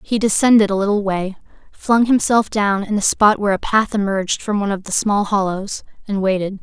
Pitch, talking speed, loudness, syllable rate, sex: 205 Hz, 210 wpm, -17 LUFS, 5.5 syllables/s, female